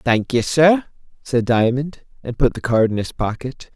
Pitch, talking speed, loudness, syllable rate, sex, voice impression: 130 Hz, 190 wpm, -18 LUFS, 4.5 syllables/s, male, very masculine, very adult-like, thick, slightly tensed, powerful, slightly bright, soft, slightly clear, fluent, slightly raspy, cool, intellectual, refreshing, slightly sincere, calm, slightly mature, slightly friendly, slightly reassuring, very unique, elegant, slightly wild, sweet, lively, kind, intense, sharp